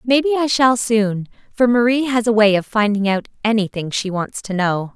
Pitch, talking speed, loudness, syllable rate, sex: 220 Hz, 205 wpm, -17 LUFS, 5.0 syllables/s, female